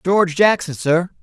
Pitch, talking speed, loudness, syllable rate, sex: 175 Hz, 145 wpm, -17 LUFS, 4.9 syllables/s, male